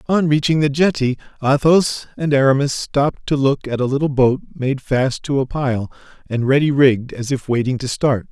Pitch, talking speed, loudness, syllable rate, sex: 135 Hz, 195 wpm, -18 LUFS, 5.1 syllables/s, male